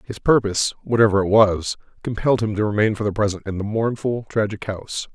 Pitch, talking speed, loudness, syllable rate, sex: 105 Hz, 200 wpm, -20 LUFS, 6.1 syllables/s, male